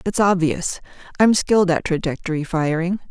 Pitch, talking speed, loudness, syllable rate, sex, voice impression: 175 Hz, 135 wpm, -19 LUFS, 5.1 syllables/s, female, feminine, adult-like, slightly fluent, slightly intellectual, calm